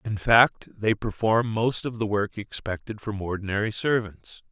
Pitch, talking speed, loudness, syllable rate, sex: 105 Hz, 160 wpm, -25 LUFS, 4.4 syllables/s, male